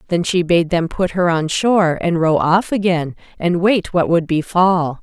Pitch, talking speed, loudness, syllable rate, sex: 175 Hz, 205 wpm, -16 LUFS, 4.4 syllables/s, female